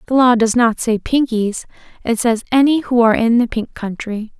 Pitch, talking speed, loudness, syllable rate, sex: 235 Hz, 205 wpm, -16 LUFS, 5.1 syllables/s, female